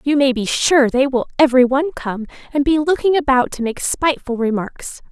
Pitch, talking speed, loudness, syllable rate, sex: 270 Hz, 200 wpm, -17 LUFS, 5.5 syllables/s, female